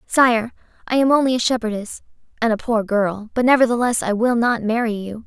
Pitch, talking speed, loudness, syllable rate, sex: 230 Hz, 195 wpm, -19 LUFS, 5.5 syllables/s, female